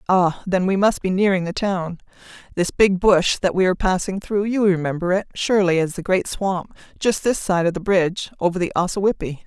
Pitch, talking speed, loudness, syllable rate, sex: 185 Hz, 205 wpm, -20 LUFS, 5.5 syllables/s, female